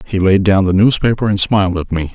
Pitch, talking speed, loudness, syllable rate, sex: 100 Hz, 250 wpm, -13 LUFS, 6.0 syllables/s, male